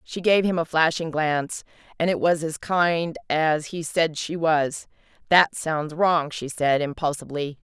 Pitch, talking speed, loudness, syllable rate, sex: 160 Hz, 170 wpm, -23 LUFS, 4.2 syllables/s, female